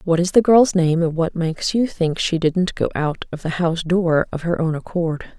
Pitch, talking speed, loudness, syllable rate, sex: 170 Hz, 245 wpm, -19 LUFS, 4.9 syllables/s, female